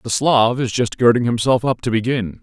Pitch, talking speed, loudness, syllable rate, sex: 120 Hz, 225 wpm, -17 LUFS, 5.2 syllables/s, male